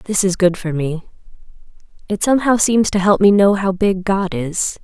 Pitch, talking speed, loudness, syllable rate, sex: 195 Hz, 200 wpm, -16 LUFS, 4.7 syllables/s, female